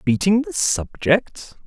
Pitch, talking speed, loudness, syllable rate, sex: 160 Hz, 110 wpm, -19 LUFS, 3.5 syllables/s, male